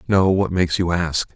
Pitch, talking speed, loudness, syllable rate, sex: 90 Hz, 220 wpm, -19 LUFS, 5.3 syllables/s, male